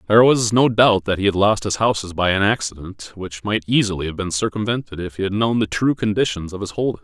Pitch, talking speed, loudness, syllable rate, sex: 105 Hz, 245 wpm, -19 LUFS, 6.1 syllables/s, male